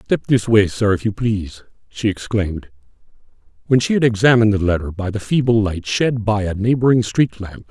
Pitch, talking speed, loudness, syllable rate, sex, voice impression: 105 Hz, 195 wpm, -17 LUFS, 5.5 syllables/s, male, masculine, old, thick, tensed, powerful, slightly hard, muffled, raspy, slightly calm, mature, slightly friendly, wild, lively, strict, intense, sharp